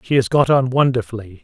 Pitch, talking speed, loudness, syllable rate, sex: 125 Hz, 210 wpm, -16 LUFS, 6.0 syllables/s, male